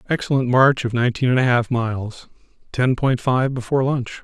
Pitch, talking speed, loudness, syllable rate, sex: 125 Hz, 185 wpm, -19 LUFS, 5.5 syllables/s, male